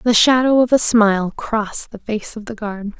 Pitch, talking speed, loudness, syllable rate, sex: 225 Hz, 220 wpm, -17 LUFS, 4.8 syllables/s, female